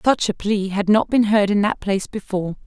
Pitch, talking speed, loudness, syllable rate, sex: 205 Hz, 250 wpm, -19 LUFS, 5.6 syllables/s, female